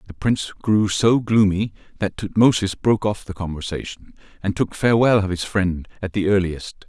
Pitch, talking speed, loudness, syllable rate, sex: 100 Hz, 175 wpm, -20 LUFS, 5.2 syllables/s, male